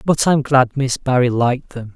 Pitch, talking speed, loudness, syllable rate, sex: 130 Hz, 215 wpm, -16 LUFS, 4.9 syllables/s, male